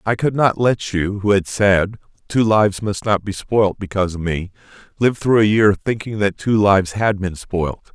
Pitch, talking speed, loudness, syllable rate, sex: 100 Hz, 210 wpm, -18 LUFS, 4.7 syllables/s, male